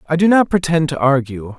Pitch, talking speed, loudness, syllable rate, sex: 155 Hz, 230 wpm, -15 LUFS, 5.4 syllables/s, male